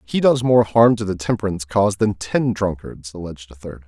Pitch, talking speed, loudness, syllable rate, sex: 100 Hz, 215 wpm, -18 LUFS, 5.6 syllables/s, male